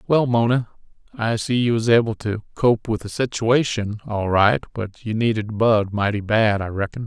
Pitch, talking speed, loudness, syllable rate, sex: 110 Hz, 180 wpm, -20 LUFS, 4.6 syllables/s, male